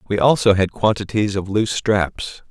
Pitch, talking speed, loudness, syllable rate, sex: 105 Hz, 170 wpm, -18 LUFS, 4.8 syllables/s, male